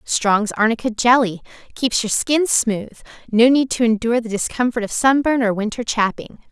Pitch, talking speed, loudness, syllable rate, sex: 230 Hz, 165 wpm, -18 LUFS, 4.9 syllables/s, female